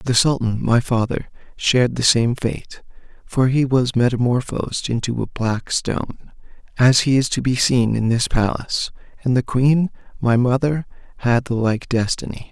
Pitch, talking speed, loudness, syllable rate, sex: 125 Hz, 165 wpm, -19 LUFS, 4.6 syllables/s, male